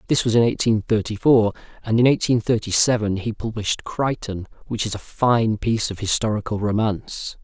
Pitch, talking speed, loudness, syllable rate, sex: 110 Hz, 180 wpm, -21 LUFS, 5.4 syllables/s, male